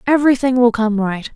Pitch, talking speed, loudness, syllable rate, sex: 240 Hz, 175 wpm, -15 LUFS, 5.9 syllables/s, female